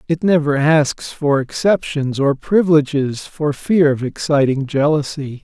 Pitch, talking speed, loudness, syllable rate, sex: 145 Hz, 130 wpm, -17 LUFS, 4.2 syllables/s, male